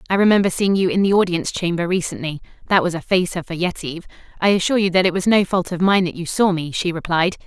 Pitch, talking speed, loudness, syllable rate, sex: 180 Hz, 250 wpm, -19 LUFS, 6.8 syllables/s, female